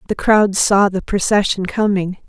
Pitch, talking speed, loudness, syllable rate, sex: 200 Hz, 160 wpm, -16 LUFS, 4.5 syllables/s, female